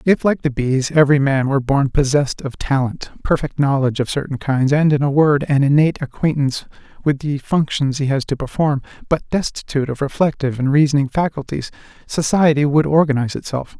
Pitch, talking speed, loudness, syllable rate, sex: 140 Hz, 180 wpm, -18 LUFS, 5.9 syllables/s, male